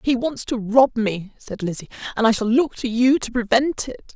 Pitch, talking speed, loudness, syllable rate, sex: 235 Hz, 230 wpm, -20 LUFS, 4.8 syllables/s, female